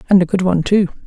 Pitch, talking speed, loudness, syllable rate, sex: 180 Hz, 280 wpm, -15 LUFS, 7.8 syllables/s, female